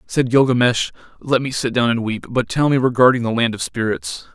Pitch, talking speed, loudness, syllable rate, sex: 120 Hz, 220 wpm, -18 LUFS, 5.5 syllables/s, male